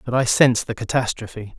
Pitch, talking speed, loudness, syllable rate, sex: 115 Hz, 190 wpm, -20 LUFS, 6.1 syllables/s, male